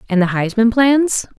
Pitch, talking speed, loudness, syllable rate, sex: 225 Hz, 175 wpm, -15 LUFS, 4.5 syllables/s, female